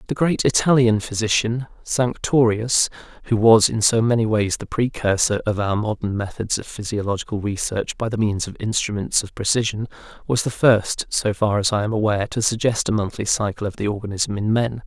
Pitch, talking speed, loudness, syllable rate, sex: 110 Hz, 185 wpm, -20 LUFS, 5.4 syllables/s, male